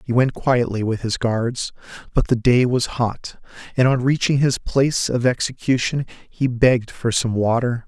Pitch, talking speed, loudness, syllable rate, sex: 120 Hz, 175 wpm, -20 LUFS, 4.5 syllables/s, male